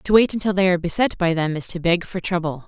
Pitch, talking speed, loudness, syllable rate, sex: 175 Hz, 290 wpm, -20 LUFS, 6.6 syllables/s, female